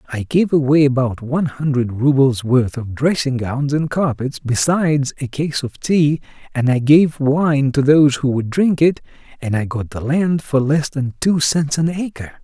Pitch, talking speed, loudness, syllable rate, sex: 140 Hz, 195 wpm, -17 LUFS, 4.5 syllables/s, male